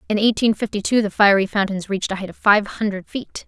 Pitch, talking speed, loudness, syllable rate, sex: 205 Hz, 240 wpm, -19 LUFS, 6.1 syllables/s, female